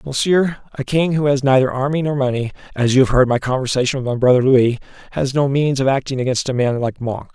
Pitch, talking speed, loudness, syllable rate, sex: 130 Hz, 235 wpm, -17 LUFS, 6.0 syllables/s, male